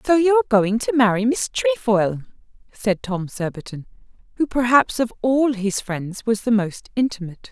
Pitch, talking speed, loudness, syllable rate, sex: 220 Hz, 160 wpm, -20 LUFS, 4.7 syllables/s, female